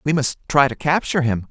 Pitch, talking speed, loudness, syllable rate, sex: 145 Hz, 240 wpm, -19 LUFS, 6.1 syllables/s, male